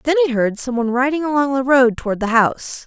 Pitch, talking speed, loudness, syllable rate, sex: 260 Hz, 230 wpm, -17 LUFS, 6.4 syllables/s, female